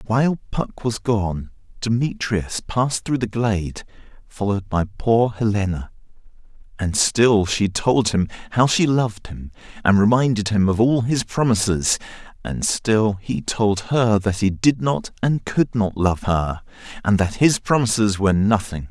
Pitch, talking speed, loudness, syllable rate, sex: 110 Hz, 155 wpm, -20 LUFS, 4.3 syllables/s, male